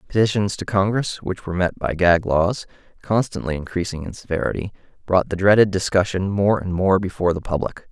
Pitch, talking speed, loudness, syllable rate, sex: 95 Hz, 175 wpm, -20 LUFS, 5.7 syllables/s, male